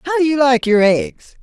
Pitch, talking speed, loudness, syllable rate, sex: 235 Hz, 210 wpm, -14 LUFS, 4.0 syllables/s, female